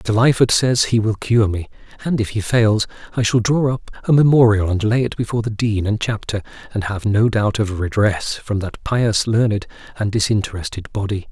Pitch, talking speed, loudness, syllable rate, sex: 110 Hz, 200 wpm, -18 LUFS, 5.1 syllables/s, male